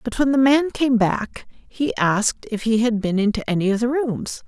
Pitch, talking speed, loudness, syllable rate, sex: 235 Hz, 230 wpm, -20 LUFS, 4.7 syllables/s, female